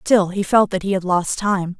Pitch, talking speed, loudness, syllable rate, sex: 190 Hz, 270 wpm, -18 LUFS, 4.7 syllables/s, female